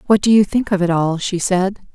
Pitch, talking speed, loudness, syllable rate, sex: 190 Hz, 280 wpm, -16 LUFS, 5.5 syllables/s, female